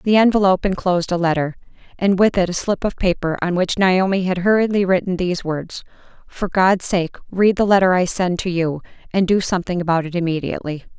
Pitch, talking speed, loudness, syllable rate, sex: 185 Hz, 195 wpm, -18 LUFS, 5.9 syllables/s, female